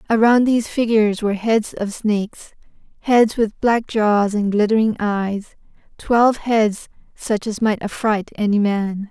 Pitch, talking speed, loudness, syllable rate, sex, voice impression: 215 Hz, 145 wpm, -18 LUFS, 4.4 syllables/s, female, feminine, adult-like, relaxed, powerful, soft, raspy, slightly intellectual, calm, elegant, slightly kind, slightly modest